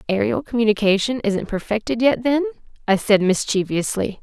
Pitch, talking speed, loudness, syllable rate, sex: 220 Hz, 130 wpm, -20 LUFS, 5.2 syllables/s, female